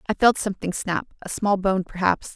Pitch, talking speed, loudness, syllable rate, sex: 195 Hz, 205 wpm, -23 LUFS, 5.4 syllables/s, female